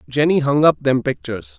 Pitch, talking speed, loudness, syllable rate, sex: 140 Hz, 190 wpm, -17 LUFS, 5.8 syllables/s, male